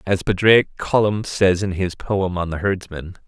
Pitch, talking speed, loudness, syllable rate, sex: 95 Hz, 185 wpm, -19 LUFS, 4.2 syllables/s, male